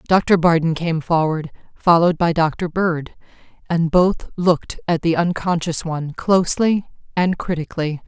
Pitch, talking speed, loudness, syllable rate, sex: 170 Hz, 135 wpm, -19 LUFS, 4.9 syllables/s, female